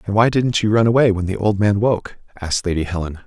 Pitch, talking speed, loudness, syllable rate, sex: 100 Hz, 255 wpm, -18 LUFS, 6.2 syllables/s, male